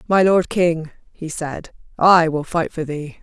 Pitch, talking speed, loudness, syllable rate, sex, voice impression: 165 Hz, 185 wpm, -18 LUFS, 3.8 syllables/s, female, very feminine, slightly gender-neutral, very adult-like, slightly thin, tensed, slightly powerful, bright, slightly soft, clear, fluent, slightly raspy, cute, slightly cool, intellectual, refreshing, sincere, slightly calm, friendly, very reassuring, very unique, elegant, wild, very sweet, very lively, strict, intense, slightly sharp